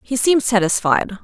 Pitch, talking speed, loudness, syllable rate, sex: 225 Hz, 145 wpm, -17 LUFS, 5.8 syllables/s, female